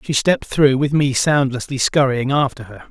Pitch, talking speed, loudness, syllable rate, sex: 135 Hz, 185 wpm, -17 LUFS, 5.0 syllables/s, male